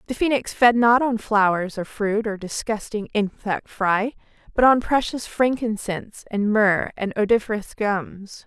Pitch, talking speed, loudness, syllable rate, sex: 215 Hz, 150 wpm, -21 LUFS, 4.5 syllables/s, female